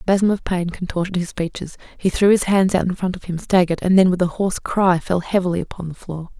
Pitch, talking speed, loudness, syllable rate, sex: 180 Hz, 265 wpm, -19 LUFS, 6.2 syllables/s, female